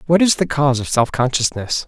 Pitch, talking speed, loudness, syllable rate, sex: 140 Hz, 225 wpm, -17 LUFS, 5.9 syllables/s, male